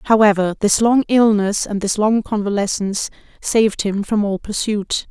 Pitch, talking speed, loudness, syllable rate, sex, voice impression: 210 Hz, 155 wpm, -17 LUFS, 4.9 syllables/s, female, very feminine, slightly adult-like, thin, tensed, slightly powerful, slightly dark, slightly hard, clear, fluent, slightly raspy, cool, very intellectual, slightly refreshing, slightly sincere, calm, slightly friendly, slightly reassuring, slightly unique, slightly elegant, wild, slightly sweet, lively, strict, slightly intense, slightly sharp, slightly light